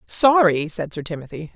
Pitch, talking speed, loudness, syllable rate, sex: 175 Hz, 155 wpm, -19 LUFS, 4.9 syllables/s, female